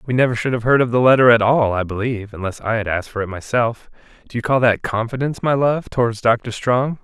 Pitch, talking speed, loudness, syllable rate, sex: 120 Hz, 245 wpm, -18 LUFS, 6.3 syllables/s, male